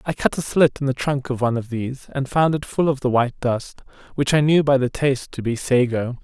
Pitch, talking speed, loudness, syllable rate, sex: 135 Hz, 280 wpm, -20 LUFS, 5.8 syllables/s, male